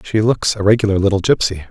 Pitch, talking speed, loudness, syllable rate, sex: 100 Hz, 210 wpm, -15 LUFS, 6.5 syllables/s, male